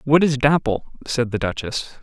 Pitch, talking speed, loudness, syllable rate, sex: 135 Hz, 180 wpm, -21 LUFS, 4.7 syllables/s, male